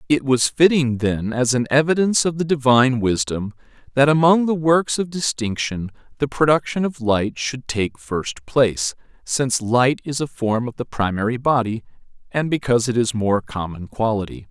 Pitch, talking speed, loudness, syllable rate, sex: 125 Hz, 170 wpm, -20 LUFS, 4.9 syllables/s, male